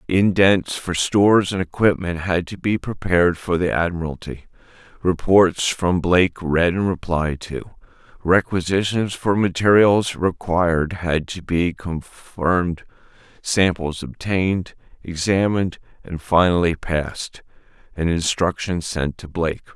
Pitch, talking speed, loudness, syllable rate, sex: 90 Hz, 115 wpm, -20 LUFS, 4.2 syllables/s, male